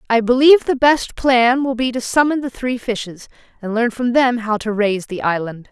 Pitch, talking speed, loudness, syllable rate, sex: 235 Hz, 220 wpm, -17 LUFS, 5.2 syllables/s, female